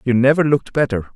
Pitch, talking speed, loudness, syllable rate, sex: 130 Hz, 205 wpm, -17 LUFS, 7.3 syllables/s, male